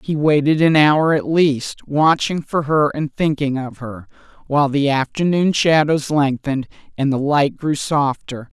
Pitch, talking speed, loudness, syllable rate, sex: 145 Hz, 160 wpm, -17 LUFS, 4.3 syllables/s, female